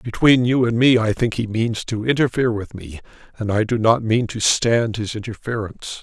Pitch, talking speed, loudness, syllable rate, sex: 115 Hz, 210 wpm, -19 LUFS, 5.2 syllables/s, male